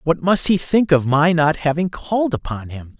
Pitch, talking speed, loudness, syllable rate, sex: 160 Hz, 220 wpm, -18 LUFS, 4.8 syllables/s, male